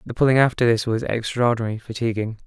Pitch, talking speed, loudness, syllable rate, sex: 115 Hz, 170 wpm, -21 LUFS, 7.0 syllables/s, male